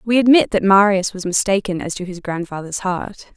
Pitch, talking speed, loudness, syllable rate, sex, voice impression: 195 Hz, 195 wpm, -17 LUFS, 5.2 syllables/s, female, very feminine, slightly young, adult-like, thin, slightly tensed, slightly powerful, bright, very clear, very fluent, slightly raspy, very cute, intellectual, very refreshing, sincere, calm, very friendly, very reassuring, unique, elegant, slightly wild, very sweet, very lively, strict, slightly intense, sharp, light